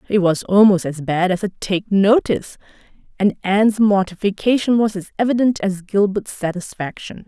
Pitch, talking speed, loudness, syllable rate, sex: 200 Hz, 150 wpm, -18 LUFS, 5.1 syllables/s, female